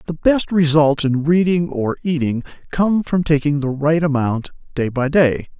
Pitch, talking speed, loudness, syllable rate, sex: 155 Hz, 170 wpm, -17 LUFS, 4.4 syllables/s, male